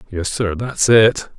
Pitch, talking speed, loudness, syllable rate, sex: 105 Hz, 175 wpm, -16 LUFS, 3.5 syllables/s, male